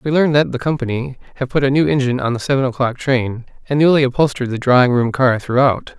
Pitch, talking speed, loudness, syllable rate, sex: 130 Hz, 230 wpm, -16 LUFS, 6.4 syllables/s, male